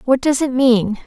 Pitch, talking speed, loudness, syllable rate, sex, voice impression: 255 Hz, 225 wpm, -16 LUFS, 4.4 syllables/s, female, feminine, slightly adult-like, slightly cute, friendly, slightly reassuring, slightly kind